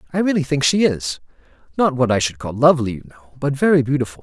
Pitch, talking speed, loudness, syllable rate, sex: 130 Hz, 225 wpm, -18 LUFS, 6.5 syllables/s, male